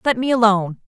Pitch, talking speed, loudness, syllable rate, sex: 225 Hz, 205 wpm, -17 LUFS, 7.0 syllables/s, female